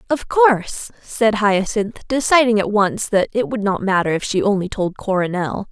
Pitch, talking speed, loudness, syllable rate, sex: 210 Hz, 180 wpm, -18 LUFS, 4.7 syllables/s, female